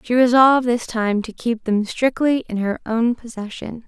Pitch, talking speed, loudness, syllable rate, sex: 230 Hz, 185 wpm, -19 LUFS, 4.6 syllables/s, female